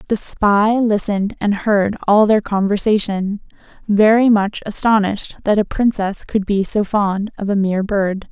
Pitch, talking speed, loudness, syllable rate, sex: 205 Hz, 160 wpm, -17 LUFS, 4.4 syllables/s, female